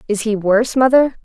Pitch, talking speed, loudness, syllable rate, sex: 230 Hz, 195 wpm, -15 LUFS, 5.7 syllables/s, female